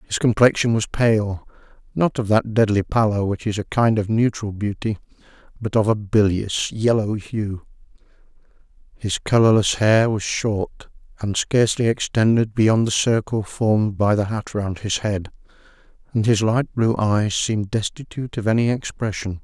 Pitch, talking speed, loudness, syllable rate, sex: 110 Hz, 155 wpm, -20 LUFS, 4.7 syllables/s, male